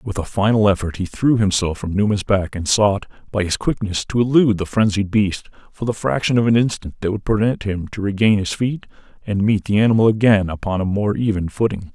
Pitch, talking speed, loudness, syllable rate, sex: 100 Hz, 220 wpm, -19 LUFS, 5.6 syllables/s, male